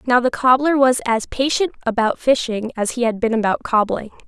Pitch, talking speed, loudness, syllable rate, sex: 240 Hz, 195 wpm, -18 LUFS, 5.4 syllables/s, female